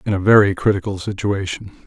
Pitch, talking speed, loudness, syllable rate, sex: 100 Hz, 160 wpm, -18 LUFS, 6.2 syllables/s, male